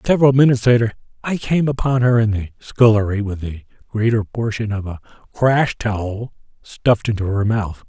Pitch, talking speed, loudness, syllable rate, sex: 115 Hz, 170 wpm, -18 LUFS, 5.4 syllables/s, male